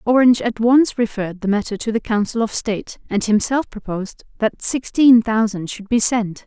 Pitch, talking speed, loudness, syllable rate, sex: 225 Hz, 185 wpm, -18 LUFS, 5.2 syllables/s, female